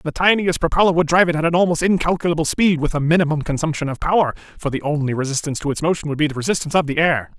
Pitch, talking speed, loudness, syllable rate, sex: 160 Hz, 245 wpm, -18 LUFS, 7.4 syllables/s, male